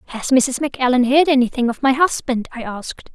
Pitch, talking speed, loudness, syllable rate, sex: 260 Hz, 190 wpm, -17 LUFS, 5.6 syllables/s, female